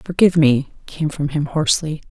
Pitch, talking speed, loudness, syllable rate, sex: 150 Hz, 170 wpm, -18 LUFS, 5.6 syllables/s, female